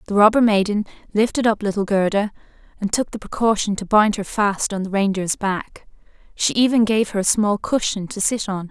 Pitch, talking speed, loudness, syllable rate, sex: 205 Hz, 200 wpm, -20 LUFS, 5.3 syllables/s, female